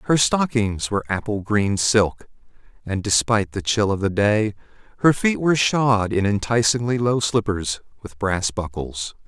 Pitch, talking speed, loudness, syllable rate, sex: 110 Hz, 155 wpm, -21 LUFS, 4.4 syllables/s, male